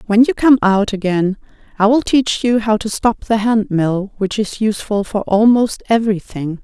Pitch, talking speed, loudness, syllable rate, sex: 215 Hz, 190 wpm, -15 LUFS, 4.7 syllables/s, female